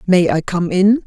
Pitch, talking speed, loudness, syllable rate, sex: 190 Hz, 225 wpm, -15 LUFS, 4.4 syllables/s, female